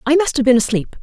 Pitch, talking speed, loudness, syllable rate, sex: 275 Hz, 295 wpm, -15 LUFS, 6.7 syllables/s, female